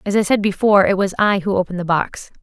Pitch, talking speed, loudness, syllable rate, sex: 195 Hz, 270 wpm, -17 LUFS, 6.8 syllables/s, female